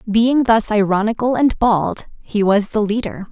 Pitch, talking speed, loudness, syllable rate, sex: 220 Hz, 165 wpm, -17 LUFS, 4.2 syllables/s, female